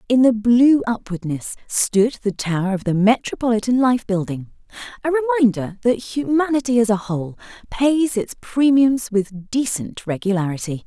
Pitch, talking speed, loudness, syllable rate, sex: 225 Hz, 140 wpm, -19 LUFS, 5.0 syllables/s, female